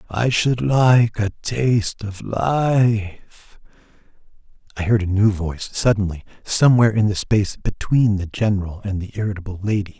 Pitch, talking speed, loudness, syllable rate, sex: 105 Hz, 145 wpm, -19 LUFS, 4.7 syllables/s, male